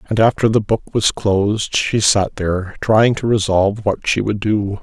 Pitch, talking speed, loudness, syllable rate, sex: 105 Hz, 200 wpm, -17 LUFS, 4.5 syllables/s, male